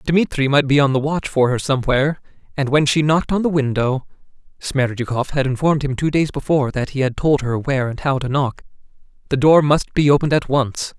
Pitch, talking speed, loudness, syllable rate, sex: 140 Hz, 220 wpm, -18 LUFS, 3.7 syllables/s, male